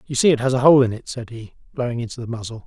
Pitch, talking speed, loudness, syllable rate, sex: 120 Hz, 315 wpm, -20 LUFS, 7.2 syllables/s, male